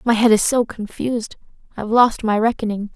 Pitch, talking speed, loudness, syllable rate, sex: 225 Hz, 185 wpm, -18 LUFS, 5.7 syllables/s, female